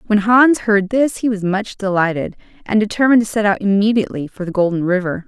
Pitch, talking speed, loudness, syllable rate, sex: 205 Hz, 205 wpm, -16 LUFS, 6.0 syllables/s, female